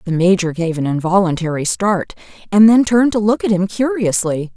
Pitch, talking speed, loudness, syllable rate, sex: 190 Hz, 185 wpm, -15 LUFS, 5.4 syllables/s, female